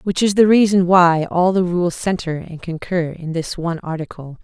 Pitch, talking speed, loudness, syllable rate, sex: 175 Hz, 205 wpm, -17 LUFS, 4.9 syllables/s, female